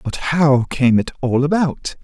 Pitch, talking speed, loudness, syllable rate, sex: 145 Hz, 175 wpm, -17 LUFS, 4.0 syllables/s, male